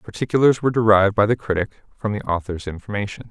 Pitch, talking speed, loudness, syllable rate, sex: 105 Hz, 200 wpm, -20 LUFS, 7.1 syllables/s, male